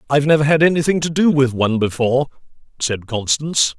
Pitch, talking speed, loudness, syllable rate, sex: 140 Hz, 175 wpm, -17 LUFS, 6.5 syllables/s, male